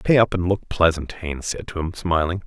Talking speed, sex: 245 wpm, male